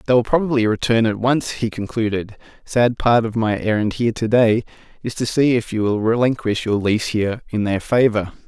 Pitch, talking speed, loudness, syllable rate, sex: 115 Hz, 205 wpm, -19 LUFS, 5.5 syllables/s, male